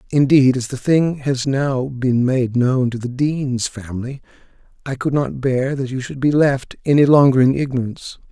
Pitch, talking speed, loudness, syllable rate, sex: 130 Hz, 190 wpm, -18 LUFS, 4.7 syllables/s, male